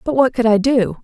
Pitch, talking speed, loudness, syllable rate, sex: 235 Hz, 290 wpm, -15 LUFS, 5.6 syllables/s, female